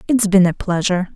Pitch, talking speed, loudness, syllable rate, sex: 190 Hz, 210 wpm, -16 LUFS, 6.2 syllables/s, female